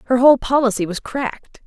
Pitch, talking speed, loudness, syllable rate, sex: 245 Hz, 180 wpm, -17 LUFS, 6.2 syllables/s, female